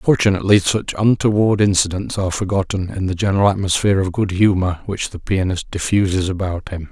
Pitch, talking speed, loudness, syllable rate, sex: 95 Hz, 165 wpm, -18 LUFS, 5.9 syllables/s, male